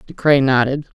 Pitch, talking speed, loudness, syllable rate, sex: 135 Hz, 185 wpm, -16 LUFS, 4.6 syllables/s, female